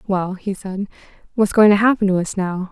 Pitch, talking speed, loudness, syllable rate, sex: 195 Hz, 220 wpm, -18 LUFS, 5.3 syllables/s, female